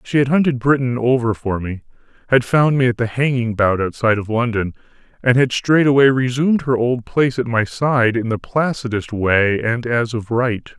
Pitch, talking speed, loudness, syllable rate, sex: 120 Hz, 195 wpm, -17 LUFS, 5.0 syllables/s, male